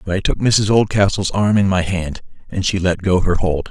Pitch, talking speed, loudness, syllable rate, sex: 95 Hz, 245 wpm, -17 LUFS, 5.0 syllables/s, male